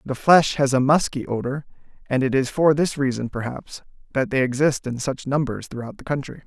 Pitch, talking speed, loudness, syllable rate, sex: 135 Hz, 205 wpm, -22 LUFS, 5.4 syllables/s, male